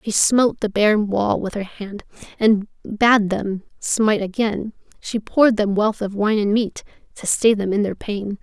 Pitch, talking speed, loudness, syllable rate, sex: 210 Hz, 190 wpm, -19 LUFS, 4.3 syllables/s, female